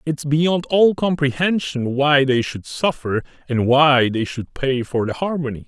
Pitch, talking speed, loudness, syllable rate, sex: 140 Hz, 170 wpm, -19 LUFS, 4.2 syllables/s, male